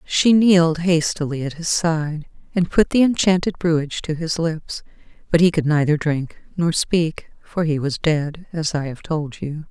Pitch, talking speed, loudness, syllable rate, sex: 160 Hz, 185 wpm, -20 LUFS, 4.4 syllables/s, female